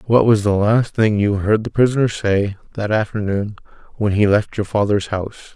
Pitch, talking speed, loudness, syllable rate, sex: 105 Hz, 195 wpm, -18 LUFS, 5.2 syllables/s, male